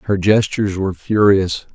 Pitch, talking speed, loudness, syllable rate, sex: 100 Hz, 135 wpm, -16 LUFS, 5.3 syllables/s, male